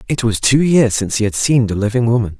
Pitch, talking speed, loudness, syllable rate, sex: 115 Hz, 275 wpm, -15 LUFS, 6.3 syllables/s, male